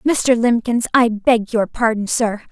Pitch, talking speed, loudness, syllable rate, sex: 230 Hz, 165 wpm, -17 LUFS, 3.8 syllables/s, female